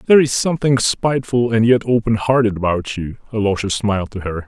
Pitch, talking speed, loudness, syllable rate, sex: 110 Hz, 190 wpm, -17 LUFS, 6.1 syllables/s, male